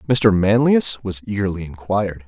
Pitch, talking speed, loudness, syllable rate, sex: 100 Hz, 130 wpm, -18 LUFS, 4.9 syllables/s, male